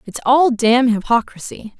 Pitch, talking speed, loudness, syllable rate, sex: 240 Hz, 135 wpm, -15 LUFS, 4.9 syllables/s, female